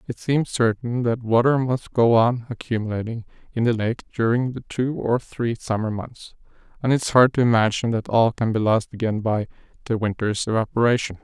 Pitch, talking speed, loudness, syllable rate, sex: 115 Hz, 185 wpm, -22 LUFS, 5.3 syllables/s, male